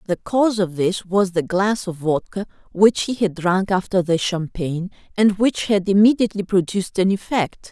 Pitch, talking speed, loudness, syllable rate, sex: 190 Hz, 180 wpm, -19 LUFS, 5.0 syllables/s, female